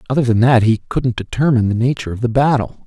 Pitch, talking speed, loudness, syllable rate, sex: 120 Hz, 230 wpm, -16 LUFS, 7.1 syllables/s, male